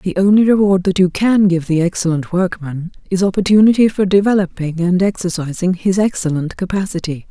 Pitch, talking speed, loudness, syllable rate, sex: 185 Hz, 155 wpm, -15 LUFS, 5.6 syllables/s, female